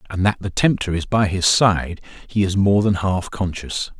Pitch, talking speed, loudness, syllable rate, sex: 95 Hz, 210 wpm, -19 LUFS, 4.6 syllables/s, male